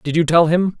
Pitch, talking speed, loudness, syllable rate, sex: 165 Hz, 300 wpm, -15 LUFS, 5.3 syllables/s, male